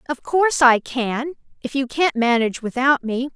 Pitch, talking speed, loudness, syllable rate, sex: 260 Hz, 180 wpm, -19 LUFS, 4.9 syllables/s, female